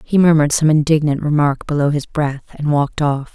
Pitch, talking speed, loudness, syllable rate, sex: 150 Hz, 195 wpm, -16 LUFS, 5.7 syllables/s, female